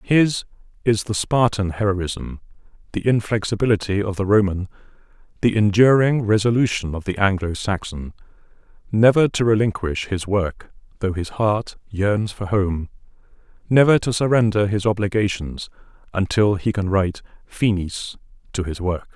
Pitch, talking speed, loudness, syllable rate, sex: 105 Hz, 125 wpm, -20 LUFS, 4.7 syllables/s, male